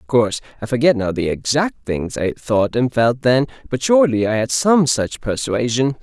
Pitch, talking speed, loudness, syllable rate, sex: 125 Hz, 200 wpm, -18 LUFS, 5.0 syllables/s, male